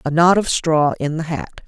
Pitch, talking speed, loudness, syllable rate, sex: 160 Hz, 250 wpm, -18 LUFS, 4.7 syllables/s, female